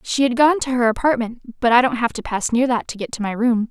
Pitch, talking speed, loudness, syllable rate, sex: 240 Hz, 310 wpm, -19 LUFS, 5.8 syllables/s, female